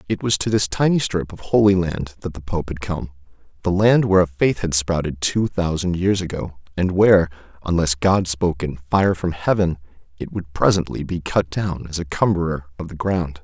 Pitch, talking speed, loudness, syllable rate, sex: 85 Hz, 200 wpm, -20 LUFS, 5.2 syllables/s, male